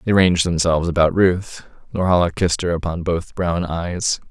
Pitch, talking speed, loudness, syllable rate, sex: 85 Hz, 165 wpm, -19 LUFS, 5.2 syllables/s, male